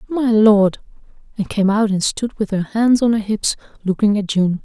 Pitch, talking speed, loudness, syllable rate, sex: 210 Hz, 205 wpm, -17 LUFS, 4.7 syllables/s, female